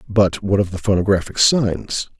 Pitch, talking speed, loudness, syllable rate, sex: 100 Hz, 165 wpm, -18 LUFS, 4.6 syllables/s, male